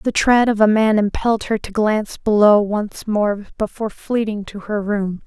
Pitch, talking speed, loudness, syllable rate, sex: 210 Hz, 195 wpm, -18 LUFS, 4.6 syllables/s, female